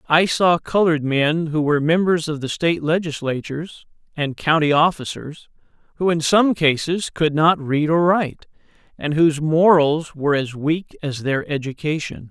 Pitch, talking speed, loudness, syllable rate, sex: 155 Hz, 155 wpm, -19 LUFS, 4.9 syllables/s, male